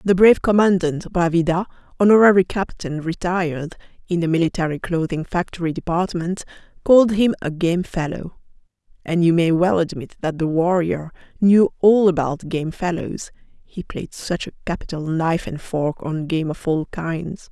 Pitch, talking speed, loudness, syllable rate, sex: 170 Hz, 145 wpm, -20 LUFS, 4.8 syllables/s, female